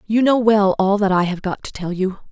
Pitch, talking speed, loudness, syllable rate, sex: 200 Hz, 285 wpm, -18 LUFS, 5.4 syllables/s, female